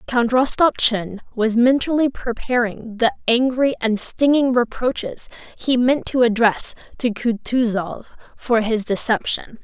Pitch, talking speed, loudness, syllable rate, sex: 240 Hz, 120 wpm, -19 LUFS, 4.1 syllables/s, female